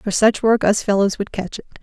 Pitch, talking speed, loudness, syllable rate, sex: 210 Hz, 265 wpm, -18 LUFS, 5.5 syllables/s, female